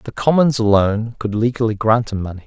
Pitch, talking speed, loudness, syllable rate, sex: 115 Hz, 195 wpm, -17 LUFS, 5.8 syllables/s, male